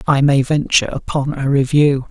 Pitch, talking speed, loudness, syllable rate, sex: 140 Hz, 170 wpm, -16 LUFS, 5.2 syllables/s, male